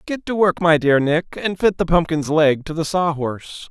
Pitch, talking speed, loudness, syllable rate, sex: 165 Hz, 245 wpm, -18 LUFS, 5.1 syllables/s, male